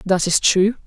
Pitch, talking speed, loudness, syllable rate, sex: 195 Hz, 210 wpm, -16 LUFS, 4.4 syllables/s, female